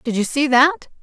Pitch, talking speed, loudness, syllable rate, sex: 255 Hz, 235 wpm, -16 LUFS, 4.8 syllables/s, female